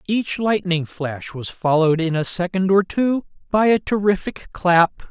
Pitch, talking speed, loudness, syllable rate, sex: 180 Hz, 165 wpm, -19 LUFS, 4.3 syllables/s, male